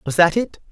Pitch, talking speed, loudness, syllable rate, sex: 175 Hz, 250 wpm, -18 LUFS, 5.8 syllables/s, male